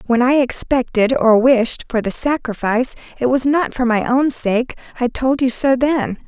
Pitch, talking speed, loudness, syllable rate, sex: 250 Hz, 190 wpm, -17 LUFS, 4.5 syllables/s, female